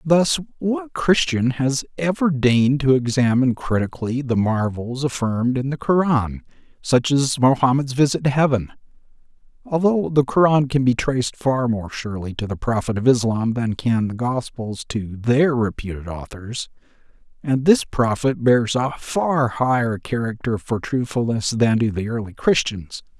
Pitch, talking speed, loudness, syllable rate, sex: 125 Hz, 150 wpm, -20 LUFS, 4.5 syllables/s, male